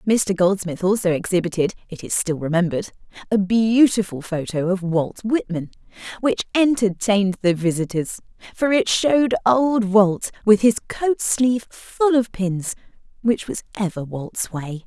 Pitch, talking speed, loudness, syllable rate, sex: 200 Hz, 140 wpm, -20 LUFS, 4.2 syllables/s, female